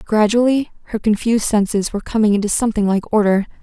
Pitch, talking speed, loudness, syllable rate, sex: 215 Hz, 165 wpm, -17 LUFS, 6.7 syllables/s, female